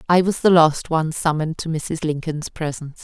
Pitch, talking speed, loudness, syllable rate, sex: 160 Hz, 200 wpm, -20 LUFS, 5.6 syllables/s, female